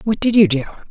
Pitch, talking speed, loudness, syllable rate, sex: 190 Hz, 265 wpm, -15 LUFS, 7.0 syllables/s, female